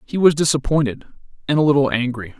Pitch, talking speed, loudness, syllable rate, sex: 140 Hz, 175 wpm, -18 LUFS, 6.5 syllables/s, male